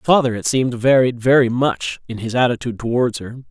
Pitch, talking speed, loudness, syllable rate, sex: 125 Hz, 190 wpm, -18 LUFS, 5.8 syllables/s, male